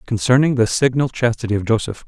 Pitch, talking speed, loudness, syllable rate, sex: 120 Hz, 175 wpm, -17 LUFS, 6.2 syllables/s, male